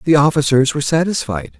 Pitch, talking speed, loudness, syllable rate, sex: 140 Hz, 150 wpm, -16 LUFS, 6.2 syllables/s, male